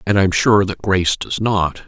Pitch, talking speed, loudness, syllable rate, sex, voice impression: 95 Hz, 255 wpm, -17 LUFS, 5.1 syllables/s, male, masculine, middle-aged, tensed, powerful, hard, raspy, cool, intellectual, calm, mature, reassuring, wild, strict, slightly sharp